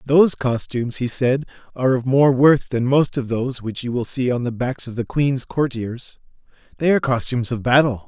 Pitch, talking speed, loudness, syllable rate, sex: 130 Hz, 210 wpm, -20 LUFS, 5.4 syllables/s, male